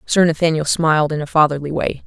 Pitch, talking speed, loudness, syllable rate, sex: 155 Hz, 205 wpm, -17 LUFS, 6.2 syllables/s, female